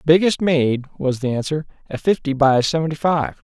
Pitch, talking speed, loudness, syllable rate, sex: 150 Hz, 170 wpm, -19 LUFS, 5.1 syllables/s, male